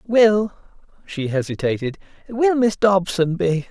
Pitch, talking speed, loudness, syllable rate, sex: 185 Hz, 115 wpm, -19 LUFS, 4.1 syllables/s, male